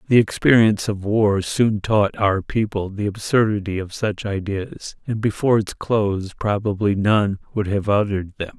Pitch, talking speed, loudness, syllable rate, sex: 105 Hz, 160 wpm, -20 LUFS, 4.7 syllables/s, male